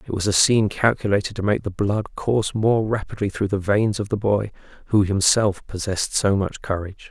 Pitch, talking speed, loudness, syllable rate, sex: 100 Hz, 205 wpm, -21 LUFS, 5.5 syllables/s, male